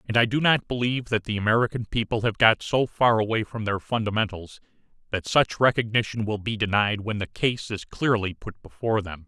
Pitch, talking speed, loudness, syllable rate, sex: 110 Hz, 200 wpm, -24 LUFS, 5.6 syllables/s, male